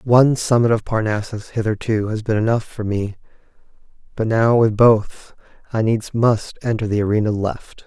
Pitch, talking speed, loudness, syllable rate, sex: 110 Hz, 160 wpm, -19 LUFS, 4.8 syllables/s, male